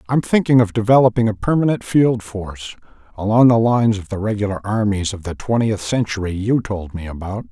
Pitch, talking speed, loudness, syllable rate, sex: 110 Hz, 185 wpm, -18 LUFS, 5.7 syllables/s, male